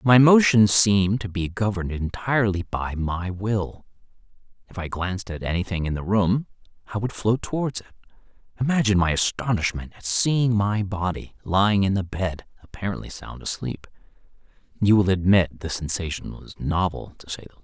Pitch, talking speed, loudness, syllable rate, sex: 100 Hz, 160 wpm, -23 LUFS, 5.4 syllables/s, male